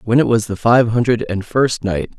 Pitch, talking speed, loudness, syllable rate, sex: 115 Hz, 245 wpm, -16 LUFS, 4.8 syllables/s, male